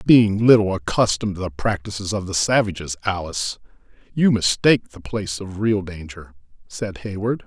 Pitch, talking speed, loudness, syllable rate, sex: 100 Hz, 155 wpm, -20 LUFS, 5.3 syllables/s, male